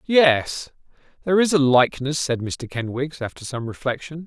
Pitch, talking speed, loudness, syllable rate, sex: 140 Hz, 155 wpm, -21 LUFS, 5.0 syllables/s, male